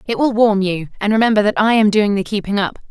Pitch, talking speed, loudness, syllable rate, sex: 210 Hz, 250 wpm, -16 LUFS, 6.4 syllables/s, female